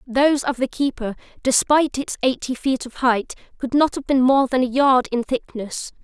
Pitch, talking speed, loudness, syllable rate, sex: 260 Hz, 200 wpm, -20 LUFS, 5.0 syllables/s, female